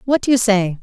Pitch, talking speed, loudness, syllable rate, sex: 215 Hz, 290 wpm, -16 LUFS, 5.8 syllables/s, female